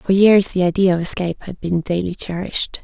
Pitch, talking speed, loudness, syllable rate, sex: 180 Hz, 210 wpm, -18 LUFS, 5.9 syllables/s, female